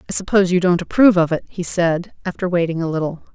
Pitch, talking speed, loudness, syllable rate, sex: 175 Hz, 235 wpm, -18 LUFS, 6.5 syllables/s, female